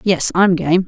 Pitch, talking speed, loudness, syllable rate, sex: 180 Hz, 205 wpm, -15 LUFS, 4.1 syllables/s, female